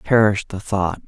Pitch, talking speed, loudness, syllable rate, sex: 100 Hz, 165 wpm, -20 LUFS, 4.2 syllables/s, male